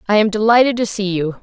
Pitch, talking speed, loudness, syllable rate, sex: 210 Hz, 250 wpm, -15 LUFS, 6.4 syllables/s, female